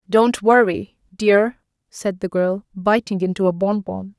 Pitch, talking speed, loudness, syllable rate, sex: 200 Hz, 145 wpm, -19 LUFS, 3.9 syllables/s, female